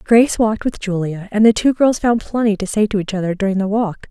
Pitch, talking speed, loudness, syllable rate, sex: 210 Hz, 265 wpm, -17 LUFS, 6.2 syllables/s, female